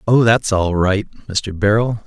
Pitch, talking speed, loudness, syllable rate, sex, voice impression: 105 Hz, 175 wpm, -17 LUFS, 4.1 syllables/s, male, masculine, adult-like, cool, sincere, slightly calm, kind